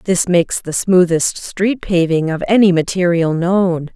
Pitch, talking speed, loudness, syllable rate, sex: 180 Hz, 150 wpm, -15 LUFS, 4.2 syllables/s, female